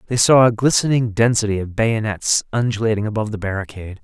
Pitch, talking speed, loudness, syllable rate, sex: 110 Hz, 165 wpm, -18 LUFS, 6.4 syllables/s, male